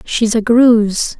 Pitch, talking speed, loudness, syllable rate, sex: 225 Hz, 150 wpm, -12 LUFS, 3.7 syllables/s, female